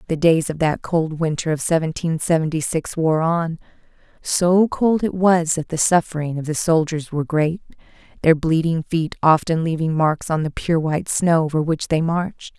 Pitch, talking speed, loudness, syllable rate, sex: 165 Hz, 185 wpm, -19 LUFS, 4.9 syllables/s, female